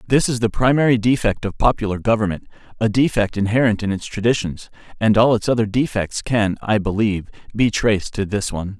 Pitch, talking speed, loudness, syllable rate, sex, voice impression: 110 Hz, 185 wpm, -19 LUFS, 5.8 syllables/s, male, very masculine, very adult-like, middle-aged, very thick, tensed, slightly powerful, bright, slightly soft, slightly clear, very fluent, very cool, very intellectual, refreshing, sincere, very calm, friendly, reassuring, slightly unique, elegant, slightly wild, slightly sweet, slightly lively, very kind